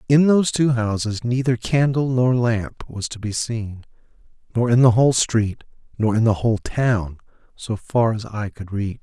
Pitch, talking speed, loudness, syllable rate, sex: 115 Hz, 185 wpm, -20 LUFS, 4.6 syllables/s, male